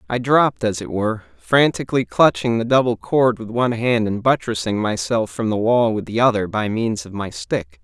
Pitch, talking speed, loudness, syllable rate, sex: 115 Hz, 205 wpm, -19 LUFS, 5.2 syllables/s, male